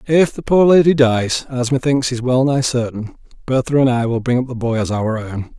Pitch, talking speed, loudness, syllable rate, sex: 125 Hz, 235 wpm, -16 LUFS, 5.1 syllables/s, male